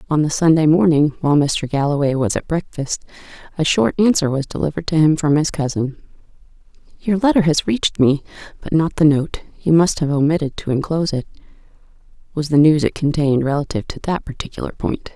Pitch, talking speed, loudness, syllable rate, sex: 155 Hz, 180 wpm, -18 LUFS, 6.0 syllables/s, female